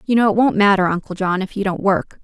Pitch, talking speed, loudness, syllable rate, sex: 200 Hz, 295 wpm, -17 LUFS, 6.2 syllables/s, female